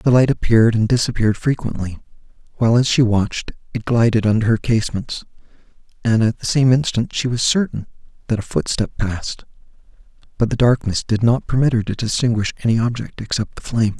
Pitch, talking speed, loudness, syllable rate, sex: 115 Hz, 175 wpm, -18 LUFS, 6.1 syllables/s, male